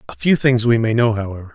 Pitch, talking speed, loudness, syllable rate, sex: 115 Hz, 270 wpm, -17 LUFS, 6.5 syllables/s, male